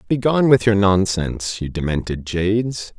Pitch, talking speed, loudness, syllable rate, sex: 100 Hz, 140 wpm, -19 LUFS, 5.0 syllables/s, male